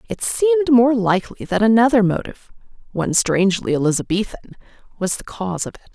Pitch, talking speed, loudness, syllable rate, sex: 215 Hz, 150 wpm, -18 LUFS, 5.5 syllables/s, female